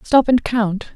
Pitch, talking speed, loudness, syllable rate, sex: 225 Hz, 190 wpm, -17 LUFS, 3.8 syllables/s, female